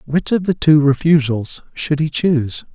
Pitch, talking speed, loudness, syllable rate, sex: 150 Hz, 175 wpm, -16 LUFS, 4.5 syllables/s, male